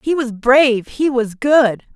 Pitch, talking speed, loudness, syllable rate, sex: 250 Hz, 185 wpm, -15 LUFS, 4.0 syllables/s, female